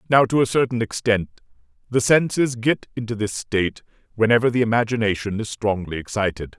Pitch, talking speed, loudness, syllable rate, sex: 115 Hz, 155 wpm, -21 LUFS, 5.7 syllables/s, male